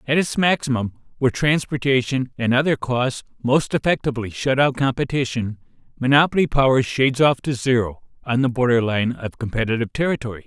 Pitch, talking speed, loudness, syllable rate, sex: 130 Hz, 150 wpm, -20 LUFS, 5.8 syllables/s, male